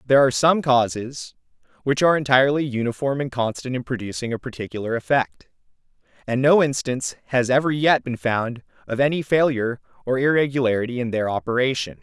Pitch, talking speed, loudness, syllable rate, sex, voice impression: 125 Hz, 155 wpm, -21 LUFS, 6.1 syllables/s, male, masculine, adult-like, slightly clear, slightly cool, refreshing, sincere, slightly elegant